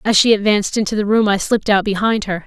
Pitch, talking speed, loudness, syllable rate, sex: 205 Hz, 270 wpm, -16 LUFS, 6.8 syllables/s, female